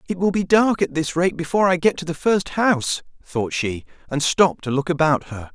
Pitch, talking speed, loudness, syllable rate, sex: 165 Hz, 240 wpm, -20 LUFS, 5.5 syllables/s, male